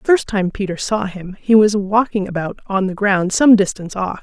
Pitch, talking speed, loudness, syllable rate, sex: 200 Hz, 225 wpm, -17 LUFS, 5.1 syllables/s, female